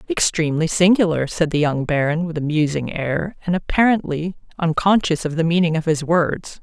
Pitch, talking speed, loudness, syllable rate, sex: 165 Hz, 170 wpm, -19 LUFS, 5.2 syllables/s, female